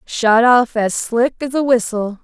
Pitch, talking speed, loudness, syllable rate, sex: 235 Hz, 190 wpm, -15 LUFS, 3.8 syllables/s, female